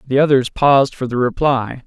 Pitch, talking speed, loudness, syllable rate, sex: 130 Hz, 195 wpm, -16 LUFS, 5.2 syllables/s, male